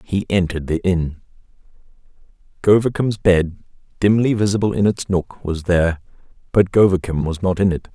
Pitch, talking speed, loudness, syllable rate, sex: 95 Hz, 145 wpm, -18 LUFS, 5.3 syllables/s, male